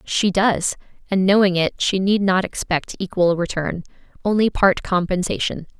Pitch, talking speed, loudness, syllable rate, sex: 190 Hz, 135 wpm, -19 LUFS, 4.6 syllables/s, female